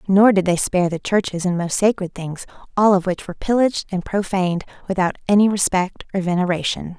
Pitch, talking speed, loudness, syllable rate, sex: 190 Hz, 190 wpm, -19 LUFS, 5.9 syllables/s, female